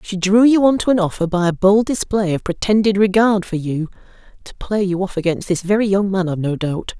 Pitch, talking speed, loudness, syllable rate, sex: 195 Hz, 230 wpm, -17 LUFS, 5.8 syllables/s, female